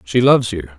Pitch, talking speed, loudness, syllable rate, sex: 100 Hz, 230 wpm, -15 LUFS, 7.1 syllables/s, male